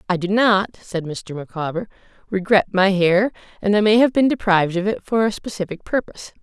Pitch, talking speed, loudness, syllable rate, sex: 195 Hz, 195 wpm, -19 LUFS, 5.6 syllables/s, female